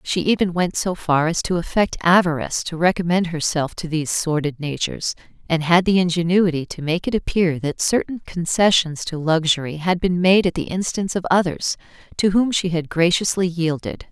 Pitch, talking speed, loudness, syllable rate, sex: 170 Hz, 185 wpm, -20 LUFS, 5.3 syllables/s, female